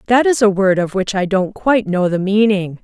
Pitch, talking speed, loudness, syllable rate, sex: 200 Hz, 255 wpm, -15 LUFS, 5.3 syllables/s, female